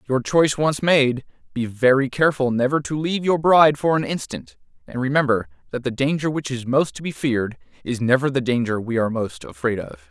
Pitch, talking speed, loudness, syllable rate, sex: 135 Hz, 210 wpm, -20 LUFS, 5.7 syllables/s, male